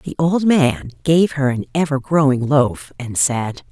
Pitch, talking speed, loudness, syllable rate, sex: 140 Hz, 175 wpm, -17 LUFS, 4.0 syllables/s, female